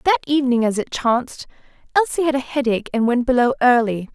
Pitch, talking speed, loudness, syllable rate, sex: 260 Hz, 190 wpm, -19 LUFS, 6.4 syllables/s, female